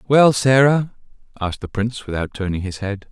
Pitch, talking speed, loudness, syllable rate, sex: 115 Hz, 175 wpm, -19 LUFS, 5.5 syllables/s, male